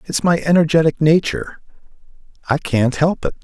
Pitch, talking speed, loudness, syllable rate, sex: 155 Hz, 155 wpm, -16 LUFS, 6.0 syllables/s, male